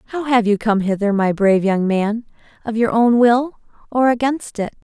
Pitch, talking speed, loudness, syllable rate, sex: 225 Hz, 180 wpm, -17 LUFS, 5.0 syllables/s, female